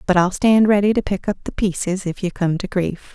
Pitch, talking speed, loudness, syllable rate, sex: 190 Hz, 265 wpm, -19 LUFS, 5.6 syllables/s, female